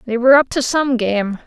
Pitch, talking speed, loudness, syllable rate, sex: 245 Hz, 245 wpm, -15 LUFS, 5.5 syllables/s, female